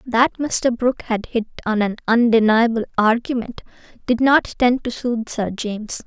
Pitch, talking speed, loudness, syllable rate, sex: 235 Hz, 160 wpm, -19 LUFS, 4.9 syllables/s, female